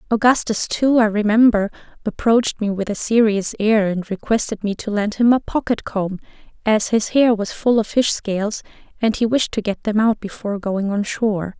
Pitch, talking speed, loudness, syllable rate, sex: 215 Hz, 195 wpm, -19 LUFS, 5.1 syllables/s, female